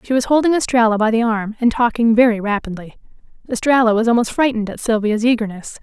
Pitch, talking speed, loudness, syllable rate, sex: 230 Hz, 185 wpm, -16 LUFS, 6.4 syllables/s, female